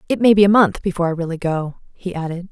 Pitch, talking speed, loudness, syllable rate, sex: 180 Hz, 265 wpm, -17 LUFS, 6.9 syllables/s, female